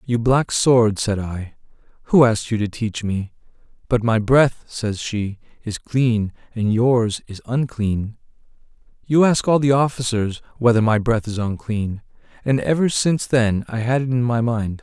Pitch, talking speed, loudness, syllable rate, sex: 115 Hz, 170 wpm, -20 LUFS, 4.3 syllables/s, male